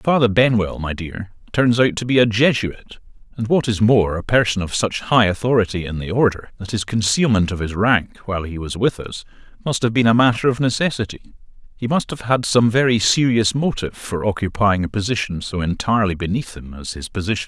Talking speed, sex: 215 wpm, male